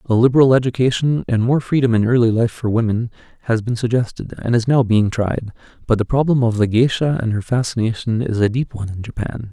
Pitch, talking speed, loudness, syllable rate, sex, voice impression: 120 Hz, 215 wpm, -18 LUFS, 6.0 syllables/s, male, masculine, adult-like, slightly soft, slightly cool, slightly calm, reassuring, slightly sweet, slightly kind